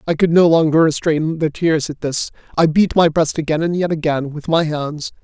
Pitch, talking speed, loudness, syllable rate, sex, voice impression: 160 Hz, 230 wpm, -17 LUFS, 5.1 syllables/s, male, very masculine, slightly old, tensed, slightly powerful, bright, slightly soft, clear, fluent, slightly raspy, slightly cool, intellectual, refreshing, sincere, slightly calm, slightly friendly, slightly reassuring, very unique, slightly elegant, wild, slightly sweet, very lively, kind, intense, slightly sharp